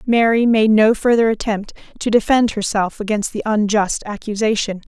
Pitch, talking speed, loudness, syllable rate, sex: 215 Hz, 145 wpm, -17 LUFS, 4.9 syllables/s, female